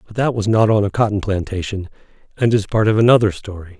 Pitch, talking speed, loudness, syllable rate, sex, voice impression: 105 Hz, 220 wpm, -17 LUFS, 6.3 syllables/s, male, masculine, middle-aged, slightly powerful, slightly hard, slightly cool, intellectual, sincere, calm, mature, unique, wild, slightly lively, slightly kind